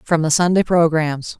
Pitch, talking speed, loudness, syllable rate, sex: 160 Hz, 170 wpm, -16 LUFS, 4.7 syllables/s, female